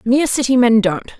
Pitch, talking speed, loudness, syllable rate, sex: 235 Hz, 200 wpm, -14 LUFS, 5.8 syllables/s, female